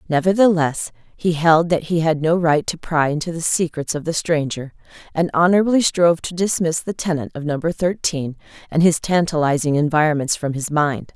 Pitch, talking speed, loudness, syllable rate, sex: 160 Hz, 180 wpm, -19 LUFS, 5.2 syllables/s, female